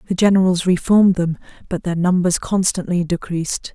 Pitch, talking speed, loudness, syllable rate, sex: 180 Hz, 145 wpm, -18 LUFS, 5.5 syllables/s, female